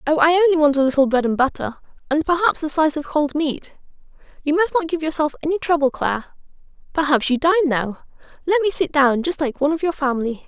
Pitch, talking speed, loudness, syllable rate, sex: 300 Hz, 205 wpm, -19 LUFS, 6.3 syllables/s, female